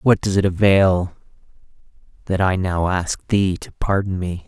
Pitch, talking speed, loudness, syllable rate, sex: 95 Hz, 160 wpm, -19 LUFS, 4.2 syllables/s, male